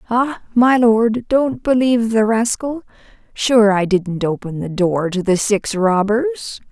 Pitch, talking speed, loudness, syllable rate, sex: 220 Hz, 150 wpm, -16 LUFS, 3.8 syllables/s, female